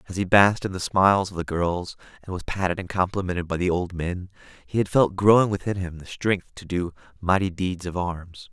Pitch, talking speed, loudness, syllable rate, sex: 90 Hz, 225 wpm, -24 LUFS, 5.5 syllables/s, male